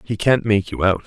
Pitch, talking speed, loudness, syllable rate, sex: 105 Hz, 280 wpm, -18 LUFS, 5.3 syllables/s, male